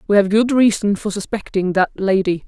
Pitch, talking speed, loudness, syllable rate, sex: 200 Hz, 195 wpm, -17 LUFS, 5.2 syllables/s, female